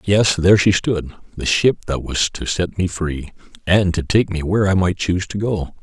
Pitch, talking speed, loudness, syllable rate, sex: 90 Hz, 225 wpm, -18 LUFS, 5.0 syllables/s, male